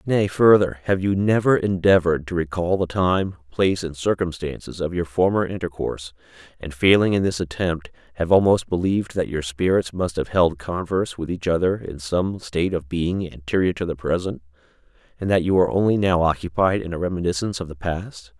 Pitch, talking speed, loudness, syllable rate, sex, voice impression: 90 Hz, 185 wpm, -21 LUFS, 5.6 syllables/s, male, masculine, middle-aged, powerful, slightly dark, hard, muffled, slightly raspy, calm, mature, wild, strict